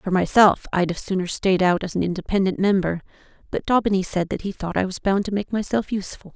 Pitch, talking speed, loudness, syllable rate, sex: 190 Hz, 225 wpm, -22 LUFS, 6.1 syllables/s, female